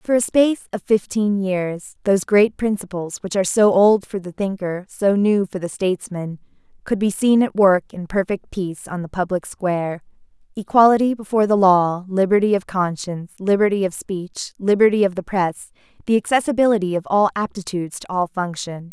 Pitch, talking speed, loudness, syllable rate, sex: 195 Hz, 175 wpm, -19 LUFS, 5.3 syllables/s, female